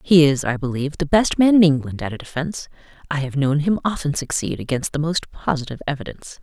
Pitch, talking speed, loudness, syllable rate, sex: 150 Hz, 215 wpm, -20 LUFS, 6.4 syllables/s, female